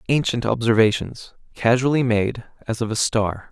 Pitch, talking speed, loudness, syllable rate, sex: 115 Hz, 135 wpm, -20 LUFS, 2.9 syllables/s, male